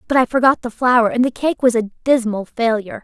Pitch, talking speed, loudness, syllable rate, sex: 240 Hz, 235 wpm, -17 LUFS, 5.6 syllables/s, female